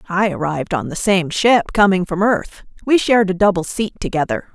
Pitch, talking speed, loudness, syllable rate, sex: 190 Hz, 200 wpm, -17 LUFS, 5.5 syllables/s, female